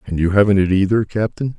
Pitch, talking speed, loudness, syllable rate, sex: 100 Hz, 230 wpm, -16 LUFS, 6.2 syllables/s, male